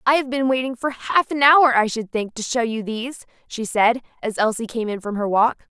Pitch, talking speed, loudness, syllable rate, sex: 240 Hz, 250 wpm, -20 LUFS, 5.2 syllables/s, female